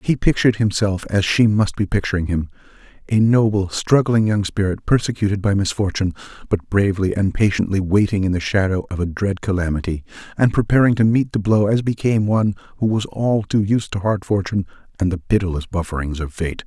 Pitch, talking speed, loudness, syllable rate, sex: 100 Hz, 185 wpm, -19 LUFS, 5.9 syllables/s, male